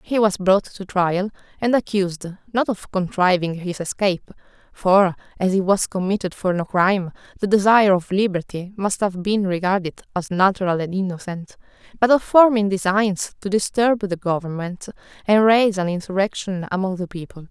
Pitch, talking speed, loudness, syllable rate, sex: 195 Hz, 160 wpm, -20 LUFS, 3.5 syllables/s, female